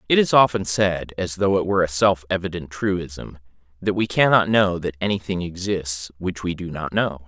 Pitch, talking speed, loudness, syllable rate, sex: 90 Hz, 200 wpm, -21 LUFS, 4.9 syllables/s, male